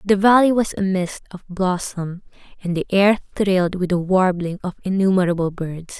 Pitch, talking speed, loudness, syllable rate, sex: 185 Hz, 170 wpm, -19 LUFS, 4.9 syllables/s, female